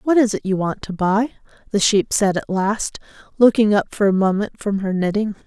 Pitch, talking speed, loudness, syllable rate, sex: 205 Hz, 220 wpm, -19 LUFS, 5.2 syllables/s, female